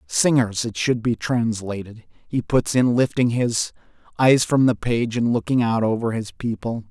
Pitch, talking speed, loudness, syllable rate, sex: 120 Hz, 175 wpm, -21 LUFS, 4.3 syllables/s, male